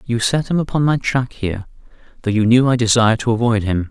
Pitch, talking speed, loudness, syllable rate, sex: 115 Hz, 230 wpm, -17 LUFS, 6.2 syllables/s, male